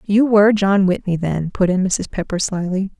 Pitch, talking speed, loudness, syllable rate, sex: 190 Hz, 200 wpm, -17 LUFS, 5.0 syllables/s, female